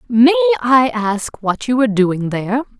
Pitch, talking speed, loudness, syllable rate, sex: 225 Hz, 170 wpm, -15 LUFS, 4.5 syllables/s, female